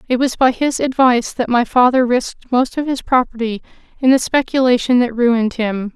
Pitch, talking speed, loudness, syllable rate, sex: 245 Hz, 190 wpm, -16 LUFS, 5.4 syllables/s, female